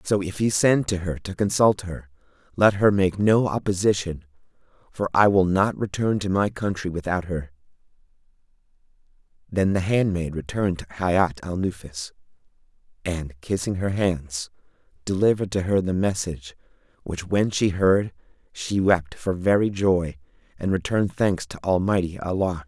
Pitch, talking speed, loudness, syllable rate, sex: 95 Hz, 150 wpm, -23 LUFS, 4.7 syllables/s, male